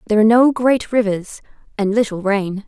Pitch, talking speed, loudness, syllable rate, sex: 215 Hz, 180 wpm, -16 LUFS, 5.5 syllables/s, female